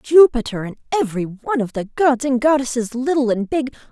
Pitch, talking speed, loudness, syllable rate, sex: 255 Hz, 185 wpm, -19 LUFS, 5.9 syllables/s, female